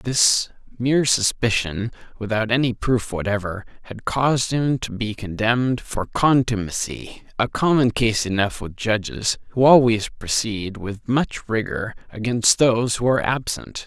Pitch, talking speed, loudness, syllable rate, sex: 115 Hz, 140 wpm, -21 LUFS, 4.4 syllables/s, male